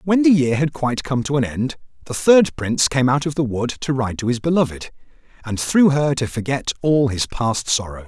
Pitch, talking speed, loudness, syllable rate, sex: 135 Hz, 230 wpm, -19 LUFS, 5.3 syllables/s, male